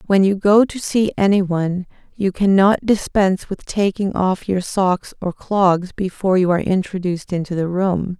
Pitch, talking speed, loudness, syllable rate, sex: 190 Hz, 175 wpm, -18 LUFS, 4.8 syllables/s, female